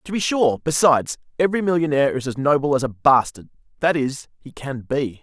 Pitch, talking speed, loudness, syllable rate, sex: 145 Hz, 185 wpm, -20 LUFS, 5.8 syllables/s, male